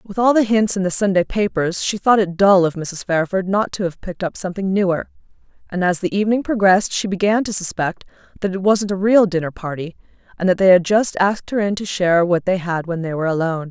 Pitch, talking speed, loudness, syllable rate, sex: 190 Hz, 240 wpm, -18 LUFS, 6.1 syllables/s, female